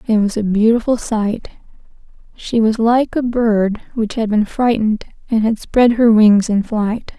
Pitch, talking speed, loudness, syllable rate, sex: 220 Hz, 175 wpm, -15 LUFS, 4.4 syllables/s, female